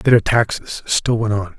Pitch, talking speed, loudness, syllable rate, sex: 110 Hz, 225 wpm, -18 LUFS, 5.3 syllables/s, male